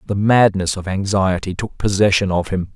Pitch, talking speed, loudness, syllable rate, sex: 95 Hz, 175 wpm, -17 LUFS, 5.1 syllables/s, male